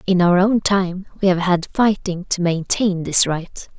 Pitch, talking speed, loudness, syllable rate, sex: 185 Hz, 190 wpm, -18 LUFS, 4.1 syllables/s, female